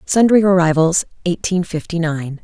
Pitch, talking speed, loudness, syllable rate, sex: 175 Hz, 125 wpm, -16 LUFS, 4.7 syllables/s, female